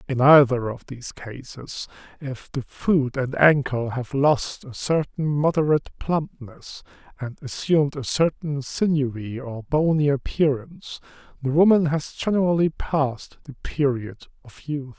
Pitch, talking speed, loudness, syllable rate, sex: 140 Hz, 130 wpm, -22 LUFS, 4.3 syllables/s, male